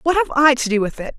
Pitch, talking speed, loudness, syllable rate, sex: 270 Hz, 355 wpm, -17 LUFS, 6.9 syllables/s, female